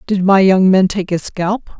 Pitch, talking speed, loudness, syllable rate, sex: 190 Hz, 235 wpm, -13 LUFS, 4.4 syllables/s, female